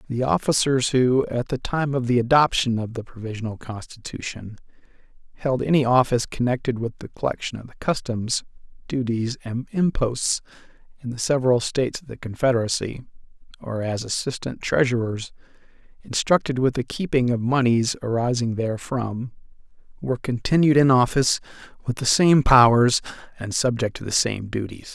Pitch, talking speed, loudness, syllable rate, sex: 125 Hz, 140 wpm, -22 LUFS, 5.4 syllables/s, male